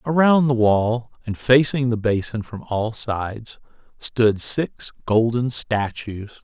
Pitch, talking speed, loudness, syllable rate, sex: 115 Hz, 130 wpm, -20 LUFS, 3.5 syllables/s, male